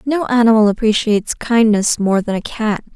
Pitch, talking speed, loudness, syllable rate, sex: 220 Hz, 165 wpm, -15 LUFS, 5.1 syllables/s, female